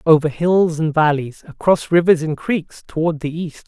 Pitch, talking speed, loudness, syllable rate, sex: 160 Hz, 180 wpm, -18 LUFS, 4.6 syllables/s, male